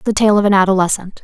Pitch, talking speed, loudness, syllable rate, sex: 200 Hz, 240 wpm, -13 LUFS, 6.7 syllables/s, female